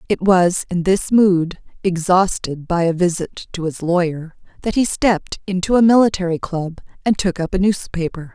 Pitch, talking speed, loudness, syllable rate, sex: 180 Hz, 175 wpm, -18 LUFS, 4.8 syllables/s, female